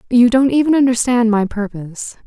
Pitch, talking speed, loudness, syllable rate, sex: 235 Hz, 160 wpm, -14 LUFS, 5.5 syllables/s, female